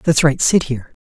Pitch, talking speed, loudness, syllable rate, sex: 140 Hz, 230 wpm, -16 LUFS, 6.2 syllables/s, male